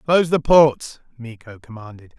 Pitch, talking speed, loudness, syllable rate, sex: 130 Hz, 135 wpm, -15 LUFS, 4.9 syllables/s, male